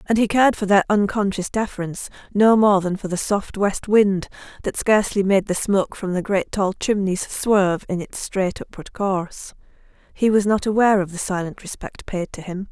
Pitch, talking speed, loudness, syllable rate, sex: 195 Hz, 200 wpm, -20 LUFS, 5.2 syllables/s, female